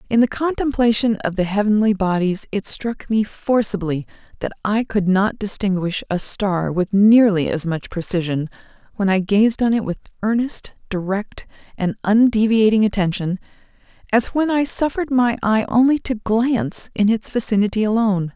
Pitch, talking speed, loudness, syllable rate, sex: 210 Hz, 155 wpm, -19 LUFS, 4.9 syllables/s, female